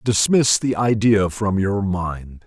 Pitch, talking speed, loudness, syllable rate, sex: 100 Hz, 145 wpm, -19 LUFS, 3.4 syllables/s, male